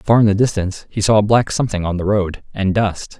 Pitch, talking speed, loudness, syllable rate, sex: 100 Hz, 265 wpm, -17 LUFS, 6.0 syllables/s, male